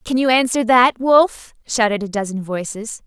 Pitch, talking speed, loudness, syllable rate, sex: 235 Hz, 175 wpm, -17 LUFS, 4.6 syllables/s, female